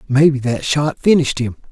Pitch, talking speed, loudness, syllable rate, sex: 135 Hz, 175 wpm, -16 LUFS, 5.6 syllables/s, male